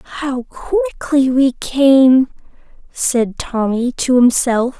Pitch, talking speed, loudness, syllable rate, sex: 260 Hz, 100 wpm, -15 LUFS, 3.0 syllables/s, female